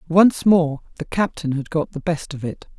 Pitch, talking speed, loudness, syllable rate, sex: 165 Hz, 215 wpm, -20 LUFS, 4.7 syllables/s, female